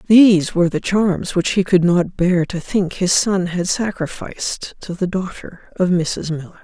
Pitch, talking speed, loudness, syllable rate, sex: 180 Hz, 190 wpm, -18 LUFS, 4.4 syllables/s, female